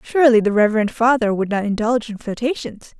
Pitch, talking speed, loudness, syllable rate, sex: 225 Hz, 180 wpm, -18 LUFS, 6.4 syllables/s, female